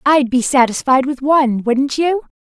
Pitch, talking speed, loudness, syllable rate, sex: 270 Hz, 175 wpm, -15 LUFS, 4.6 syllables/s, female